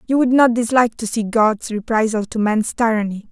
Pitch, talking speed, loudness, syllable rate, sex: 225 Hz, 200 wpm, -17 LUFS, 5.5 syllables/s, female